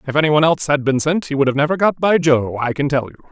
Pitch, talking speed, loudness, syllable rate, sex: 145 Hz, 310 wpm, -17 LUFS, 7.2 syllables/s, male